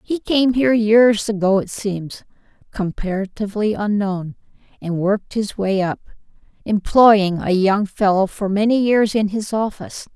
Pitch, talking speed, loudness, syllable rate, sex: 205 Hz, 140 wpm, -18 LUFS, 4.5 syllables/s, female